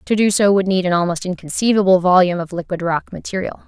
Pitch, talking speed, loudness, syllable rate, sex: 185 Hz, 210 wpm, -17 LUFS, 6.5 syllables/s, female